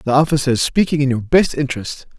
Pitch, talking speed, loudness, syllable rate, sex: 140 Hz, 220 wpm, -17 LUFS, 6.6 syllables/s, male